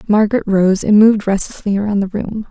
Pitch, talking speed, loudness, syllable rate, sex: 205 Hz, 190 wpm, -14 LUFS, 6.0 syllables/s, female